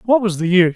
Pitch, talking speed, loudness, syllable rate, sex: 195 Hz, 315 wpm, -16 LUFS, 8.2 syllables/s, male